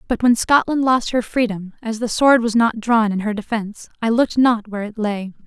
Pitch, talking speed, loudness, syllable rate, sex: 225 Hz, 230 wpm, -18 LUFS, 5.4 syllables/s, female